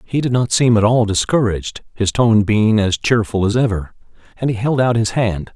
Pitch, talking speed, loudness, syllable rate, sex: 110 Hz, 215 wpm, -16 LUFS, 5.1 syllables/s, male